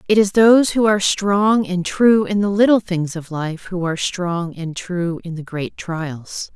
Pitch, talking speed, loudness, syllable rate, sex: 185 Hz, 210 wpm, -18 LUFS, 4.3 syllables/s, female